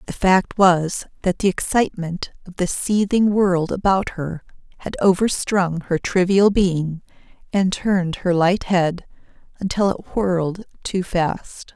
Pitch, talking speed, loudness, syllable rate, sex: 185 Hz, 140 wpm, -20 LUFS, 4.0 syllables/s, female